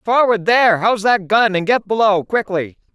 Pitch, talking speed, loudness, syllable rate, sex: 210 Hz, 140 wpm, -15 LUFS, 5.2 syllables/s, female